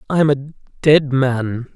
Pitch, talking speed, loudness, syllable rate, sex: 135 Hz, 170 wpm, -17 LUFS, 3.3 syllables/s, male